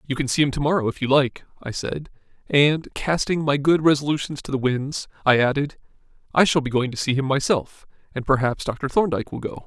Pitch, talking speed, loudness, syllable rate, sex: 140 Hz, 215 wpm, -22 LUFS, 5.6 syllables/s, male